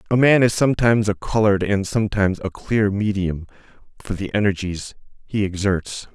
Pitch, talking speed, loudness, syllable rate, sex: 100 Hz, 155 wpm, -20 LUFS, 5.6 syllables/s, male